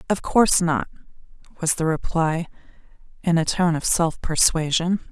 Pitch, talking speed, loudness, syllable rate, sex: 170 Hz, 140 wpm, -21 LUFS, 4.7 syllables/s, female